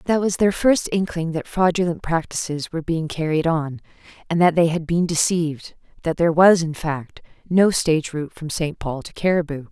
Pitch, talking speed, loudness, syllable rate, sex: 165 Hz, 190 wpm, -20 LUFS, 5.3 syllables/s, female